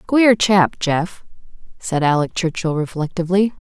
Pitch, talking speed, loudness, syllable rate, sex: 180 Hz, 115 wpm, -18 LUFS, 4.5 syllables/s, female